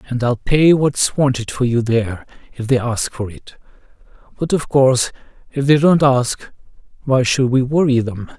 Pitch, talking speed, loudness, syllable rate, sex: 130 Hz, 180 wpm, -16 LUFS, 4.7 syllables/s, male